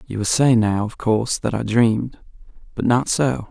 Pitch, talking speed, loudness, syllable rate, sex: 115 Hz, 205 wpm, -19 LUFS, 4.9 syllables/s, male